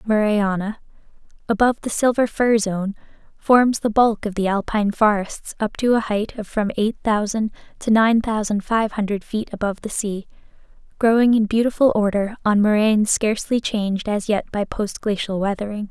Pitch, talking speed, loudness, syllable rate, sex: 215 Hz, 165 wpm, -20 LUFS, 5.1 syllables/s, female